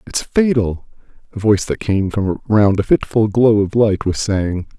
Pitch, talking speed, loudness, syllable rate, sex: 105 Hz, 190 wpm, -16 LUFS, 4.5 syllables/s, male